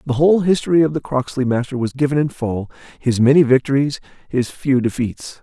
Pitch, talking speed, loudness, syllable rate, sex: 135 Hz, 190 wpm, -18 LUFS, 5.7 syllables/s, male